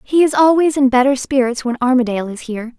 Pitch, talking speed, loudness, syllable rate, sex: 260 Hz, 215 wpm, -15 LUFS, 6.4 syllables/s, female